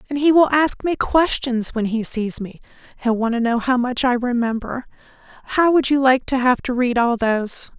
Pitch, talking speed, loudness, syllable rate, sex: 250 Hz, 225 wpm, -19 LUFS, 5.2 syllables/s, female